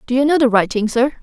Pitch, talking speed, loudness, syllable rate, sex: 250 Hz, 295 wpm, -15 LUFS, 6.7 syllables/s, female